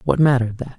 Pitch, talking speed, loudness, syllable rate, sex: 130 Hz, 230 wpm, -18 LUFS, 7.3 syllables/s, male